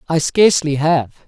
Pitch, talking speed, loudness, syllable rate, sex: 165 Hz, 140 wpm, -15 LUFS, 5.0 syllables/s, female